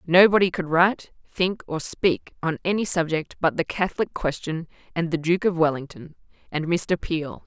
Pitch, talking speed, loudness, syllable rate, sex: 170 Hz, 170 wpm, -23 LUFS, 4.8 syllables/s, female